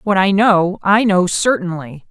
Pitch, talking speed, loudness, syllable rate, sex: 190 Hz, 170 wpm, -14 LUFS, 4.1 syllables/s, female